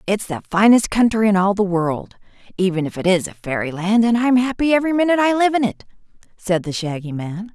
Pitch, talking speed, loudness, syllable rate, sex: 205 Hz, 215 wpm, -18 LUFS, 5.9 syllables/s, female